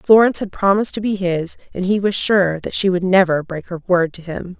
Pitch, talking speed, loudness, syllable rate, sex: 185 Hz, 250 wpm, -17 LUFS, 5.5 syllables/s, female